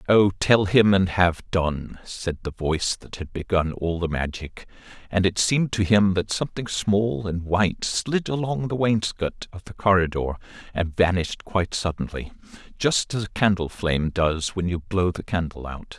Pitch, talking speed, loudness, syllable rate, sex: 95 Hz, 180 wpm, -23 LUFS, 4.7 syllables/s, male